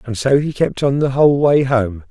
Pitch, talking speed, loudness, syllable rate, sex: 130 Hz, 255 wpm, -15 LUFS, 5.1 syllables/s, male